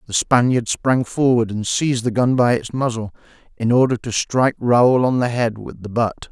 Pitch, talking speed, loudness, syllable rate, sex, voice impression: 120 Hz, 210 wpm, -18 LUFS, 4.9 syllables/s, male, very masculine, very adult-like, very old, thick, slightly relaxed, weak, slightly dark, slightly hard, slightly muffled, fluent, slightly raspy, cool, intellectual, sincere, calm, very mature, slightly friendly, reassuring, unique, slightly wild, slightly strict